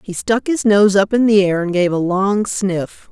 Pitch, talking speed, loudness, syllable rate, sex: 200 Hz, 250 wpm, -15 LUFS, 4.3 syllables/s, female